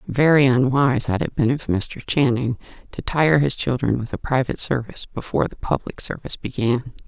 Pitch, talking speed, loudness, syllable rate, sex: 130 Hz, 180 wpm, -21 LUFS, 5.6 syllables/s, female